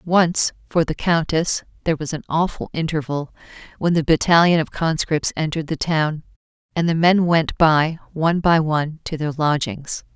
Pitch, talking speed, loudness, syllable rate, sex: 160 Hz, 165 wpm, -20 LUFS, 4.9 syllables/s, female